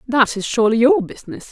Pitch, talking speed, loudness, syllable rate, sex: 245 Hz, 200 wpm, -16 LUFS, 6.6 syllables/s, female